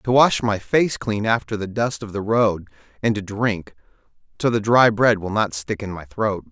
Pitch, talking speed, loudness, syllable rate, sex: 105 Hz, 220 wpm, -21 LUFS, 4.6 syllables/s, male